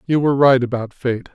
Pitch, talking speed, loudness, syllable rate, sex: 130 Hz, 220 wpm, -17 LUFS, 6.0 syllables/s, male